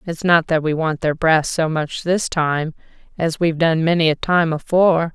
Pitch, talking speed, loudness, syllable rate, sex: 165 Hz, 210 wpm, -18 LUFS, 4.8 syllables/s, female